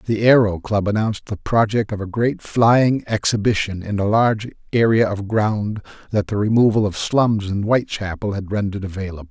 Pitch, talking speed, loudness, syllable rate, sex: 105 Hz, 175 wpm, -19 LUFS, 5.3 syllables/s, male